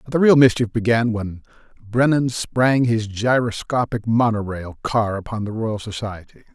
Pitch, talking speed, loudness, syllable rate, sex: 115 Hz, 155 wpm, -20 LUFS, 4.6 syllables/s, male